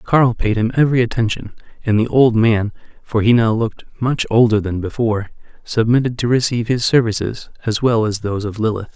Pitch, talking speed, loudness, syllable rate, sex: 115 Hz, 190 wpm, -17 LUFS, 5.7 syllables/s, male